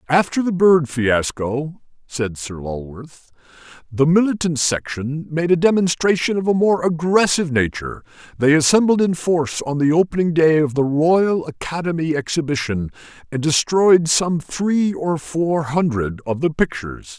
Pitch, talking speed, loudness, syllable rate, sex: 155 Hz, 145 wpm, -18 LUFS, 4.6 syllables/s, male